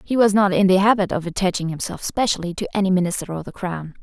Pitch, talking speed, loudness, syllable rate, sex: 190 Hz, 240 wpm, -20 LUFS, 6.5 syllables/s, female